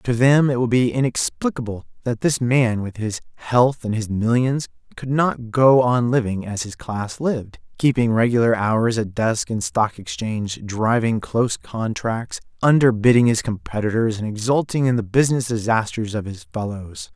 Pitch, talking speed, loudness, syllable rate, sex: 115 Hz, 165 wpm, -20 LUFS, 4.7 syllables/s, male